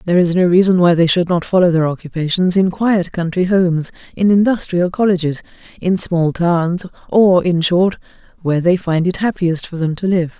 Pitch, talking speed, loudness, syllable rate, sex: 175 Hz, 190 wpm, -15 LUFS, 5.3 syllables/s, female